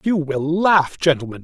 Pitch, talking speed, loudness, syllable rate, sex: 160 Hz, 165 wpm, -18 LUFS, 4.5 syllables/s, male